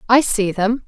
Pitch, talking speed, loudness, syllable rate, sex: 220 Hz, 205 wpm, -17 LUFS, 4.4 syllables/s, female